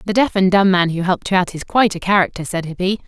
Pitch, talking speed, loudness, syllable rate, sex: 185 Hz, 295 wpm, -17 LUFS, 7.0 syllables/s, female